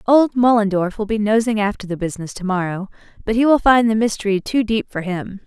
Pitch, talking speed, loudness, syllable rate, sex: 215 Hz, 210 wpm, -18 LUFS, 5.9 syllables/s, female